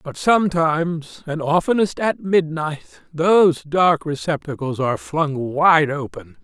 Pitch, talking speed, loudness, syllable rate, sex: 155 Hz, 120 wpm, -19 LUFS, 4.1 syllables/s, male